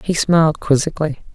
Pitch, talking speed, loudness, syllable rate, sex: 155 Hz, 135 wpm, -17 LUFS, 5.7 syllables/s, female